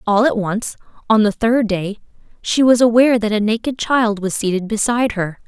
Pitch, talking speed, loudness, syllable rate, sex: 220 Hz, 195 wpm, -16 LUFS, 5.3 syllables/s, female